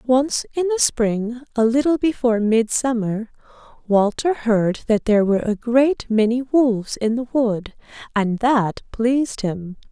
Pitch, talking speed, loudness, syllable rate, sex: 235 Hz, 145 wpm, -19 LUFS, 4.2 syllables/s, female